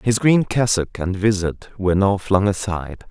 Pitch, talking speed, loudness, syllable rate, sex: 100 Hz, 175 wpm, -19 LUFS, 4.8 syllables/s, male